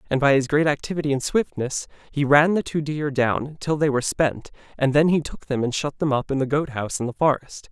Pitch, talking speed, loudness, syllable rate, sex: 145 Hz, 255 wpm, -22 LUFS, 5.7 syllables/s, male